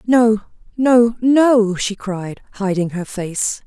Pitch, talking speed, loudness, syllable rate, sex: 215 Hz, 130 wpm, -17 LUFS, 3.1 syllables/s, female